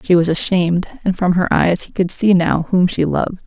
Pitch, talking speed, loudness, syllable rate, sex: 180 Hz, 240 wpm, -16 LUFS, 5.4 syllables/s, female